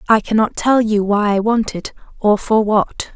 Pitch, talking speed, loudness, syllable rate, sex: 215 Hz, 210 wpm, -16 LUFS, 4.4 syllables/s, female